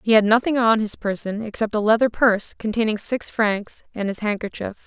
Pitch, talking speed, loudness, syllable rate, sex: 215 Hz, 195 wpm, -21 LUFS, 5.5 syllables/s, female